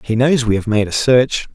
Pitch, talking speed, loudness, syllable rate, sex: 120 Hz, 270 wpm, -15 LUFS, 5.0 syllables/s, male